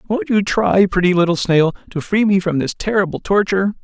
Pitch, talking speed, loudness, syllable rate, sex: 185 Hz, 205 wpm, -16 LUFS, 5.5 syllables/s, male